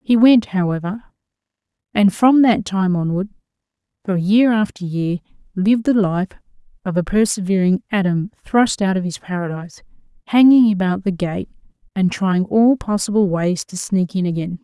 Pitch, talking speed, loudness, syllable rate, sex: 195 Hz, 150 wpm, -17 LUFS, 4.9 syllables/s, female